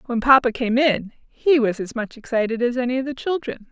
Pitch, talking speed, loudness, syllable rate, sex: 245 Hz, 225 wpm, -20 LUFS, 5.6 syllables/s, female